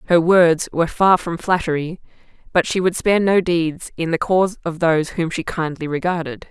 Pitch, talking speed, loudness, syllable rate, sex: 170 Hz, 195 wpm, -18 LUFS, 5.3 syllables/s, female